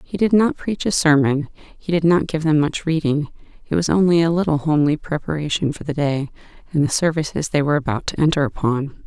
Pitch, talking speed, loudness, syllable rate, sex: 155 Hz, 210 wpm, -19 LUFS, 5.8 syllables/s, female